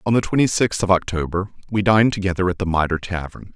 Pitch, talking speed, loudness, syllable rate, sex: 95 Hz, 220 wpm, -20 LUFS, 6.5 syllables/s, male